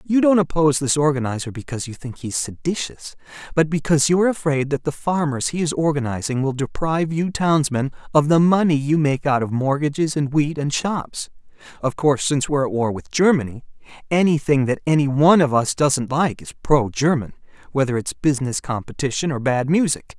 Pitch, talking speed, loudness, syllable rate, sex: 145 Hz, 185 wpm, -20 LUFS, 5.6 syllables/s, male